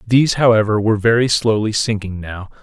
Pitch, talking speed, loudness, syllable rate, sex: 110 Hz, 160 wpm, -16 LUFS, 5.9 syllables/s, male